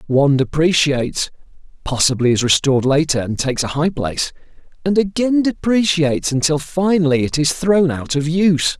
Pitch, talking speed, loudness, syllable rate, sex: 155 Hz, 150 wpm, -17 LUFS, 5.4 syllables/s, male